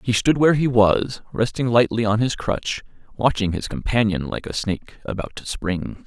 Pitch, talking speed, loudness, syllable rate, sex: 115 Hz, 190 wpm, -21 LUFS, 5.2 syllables/s, male